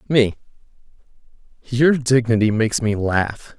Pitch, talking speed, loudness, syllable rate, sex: 115 Hz, 100 wpm, -18 LUFS, 4.2 syllables/s, male